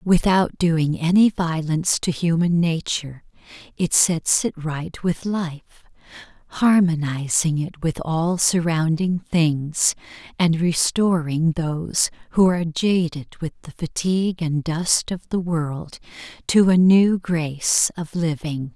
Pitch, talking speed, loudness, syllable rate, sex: 165 Hz, 125 wpm, -20 LUFS, 3.8 syllables/s, female